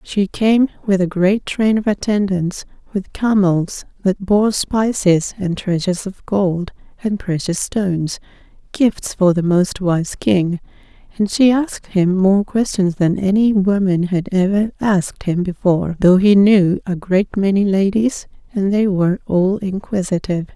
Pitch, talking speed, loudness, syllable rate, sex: 195 Hz, 150 wpm, -17 LUFS, 4.2 syllables/s, female